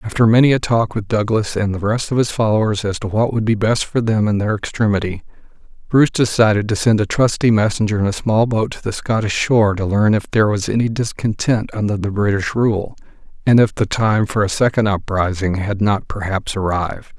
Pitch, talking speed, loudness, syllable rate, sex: 105 Hz, 215 wpm, -17 LUFS, 5.6 syllables/s, male